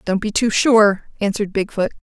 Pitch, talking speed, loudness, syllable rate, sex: 210 Hz, 205 wpm, -17 LUFS, 5.2 syllables/s, female